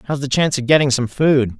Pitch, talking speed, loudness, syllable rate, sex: 135 Hz, 265 wpm, -16 LUFS, 5.8 syllables/s, male